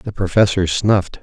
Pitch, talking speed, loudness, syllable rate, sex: 100 Hz, 145 wpm, -16 LUFS, 5.0 syllables/s, male